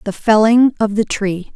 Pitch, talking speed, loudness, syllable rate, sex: 215 Hz, 195 wpm, -14 LUFS, 4.3 syllables/s, female